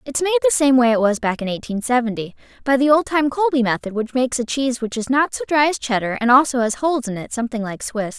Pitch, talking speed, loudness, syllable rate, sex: 255 Hz, 270 wpm, -19 LUFS, 6.5 syllables/s, female